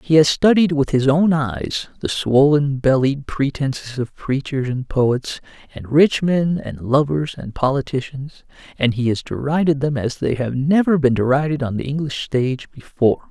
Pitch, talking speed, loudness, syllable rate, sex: 140 Hz, 170 wpm, -19 LUFS, 4.6 syllables/s, male